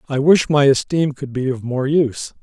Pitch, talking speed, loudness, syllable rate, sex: 140 Hz, 225 wpm, -17 LUFS, 5.1 syllables/s, male